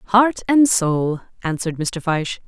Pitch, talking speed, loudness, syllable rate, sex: 190 Hz, 145 wpm, -19 LUFS, 4.3 syllables/s, female